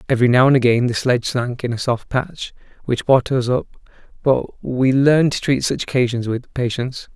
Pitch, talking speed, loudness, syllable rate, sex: 125 Hz, 200 wpm, -18 LUFS, 5.4 syllables/s, male